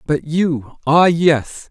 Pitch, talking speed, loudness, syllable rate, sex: 155 Hz, 105 wpm, -16 LUFS, 2.8 syllables/s, male